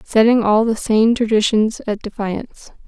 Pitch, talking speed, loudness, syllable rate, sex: 220 Hz, 145 wpm, -17 LUFS, 4.6 syllables/s, female